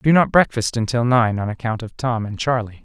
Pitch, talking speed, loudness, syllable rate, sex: 120 Hz, 255 wpm, -19 LUFS, 5.9 syllables/s, male